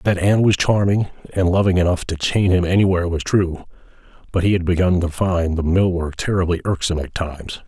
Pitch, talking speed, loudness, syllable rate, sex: 90 Hz, 205 wpm, -19 LUFS, 6.0 syllables/s, male